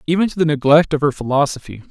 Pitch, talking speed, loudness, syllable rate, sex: 150 Hz, 220 wpm, -16 LUFS, 7.0 syllables/s, male